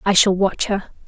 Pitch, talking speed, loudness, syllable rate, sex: 195 Hz, 225 wpm, -18 LUFS, 4.7 syllables/s, female